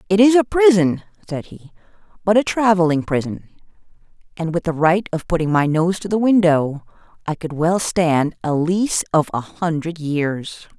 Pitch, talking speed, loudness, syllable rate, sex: 170 Hz, 170 wpm, -18 LUFS, 4.7 syllables/s, female